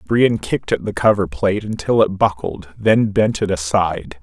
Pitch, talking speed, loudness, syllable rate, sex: 100 Hz, 185 wpm, -18 LUFS, 4.9 syllables/s, male